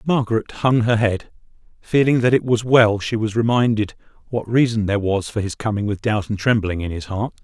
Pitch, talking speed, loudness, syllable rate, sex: 110 Hz, 210 wpm, -19 LUFS, 5.4 syllables/s, male